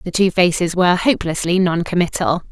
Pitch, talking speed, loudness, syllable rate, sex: 180 Hz, 165 wpm, -17 LUFS, 5.9 syllables/s, female